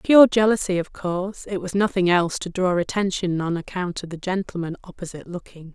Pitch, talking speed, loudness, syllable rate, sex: 180 Hz, 190 wpm, -22 LUFS, 5.8 syllables/s, female